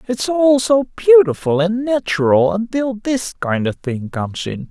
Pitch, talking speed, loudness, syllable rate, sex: 205 Hz, 165 wpm, -16 LUFS, 4.2 syllables/s, male